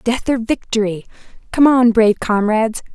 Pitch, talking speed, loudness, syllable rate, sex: 230 Hz, 145 wpm, -15 LUFS, 5.1 syllables/s, female